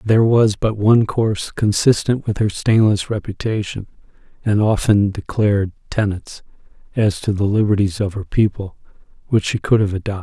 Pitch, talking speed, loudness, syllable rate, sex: 105 Hz, 155 wpm, -18 LUFS, 5.2 syllables/s, male